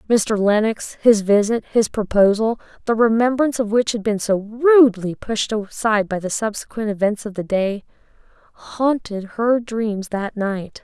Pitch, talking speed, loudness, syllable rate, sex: 215 Hz, 140 wpm, -19 LUFS, 4.5 syllables/s, female